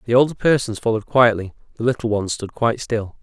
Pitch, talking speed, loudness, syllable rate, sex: 115 Hz, 205 wpm, -19 LUFS, 6.4 syllables/s, male